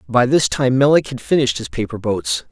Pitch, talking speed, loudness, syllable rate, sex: 125 Hz, 215 wpm, -17 LUFS, 5.6 syllables/s, male